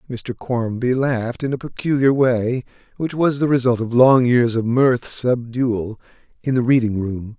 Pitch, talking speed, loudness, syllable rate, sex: 125 Hz, 170 wpm, -19 LUFS, 4.4 syllables/s, male